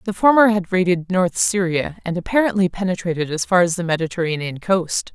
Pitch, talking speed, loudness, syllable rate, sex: 180 Hz, 175 wpm, -19 LUFS, 5.6 syllables/s, female